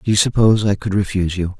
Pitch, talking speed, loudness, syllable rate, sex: 100 Hz, 265 wpm, -17 LUFS, 7.4 syllables/s, male